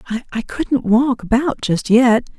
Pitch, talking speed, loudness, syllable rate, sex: 240 Hz, 150 wpm, -17 LUFS, 3.9 syllables/s, female